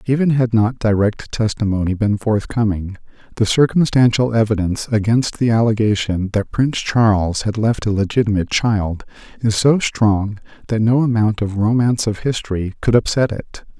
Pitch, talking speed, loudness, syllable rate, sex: 110 Hz, 150 wpm, -17 LUFS, 5.1 syllables/s, male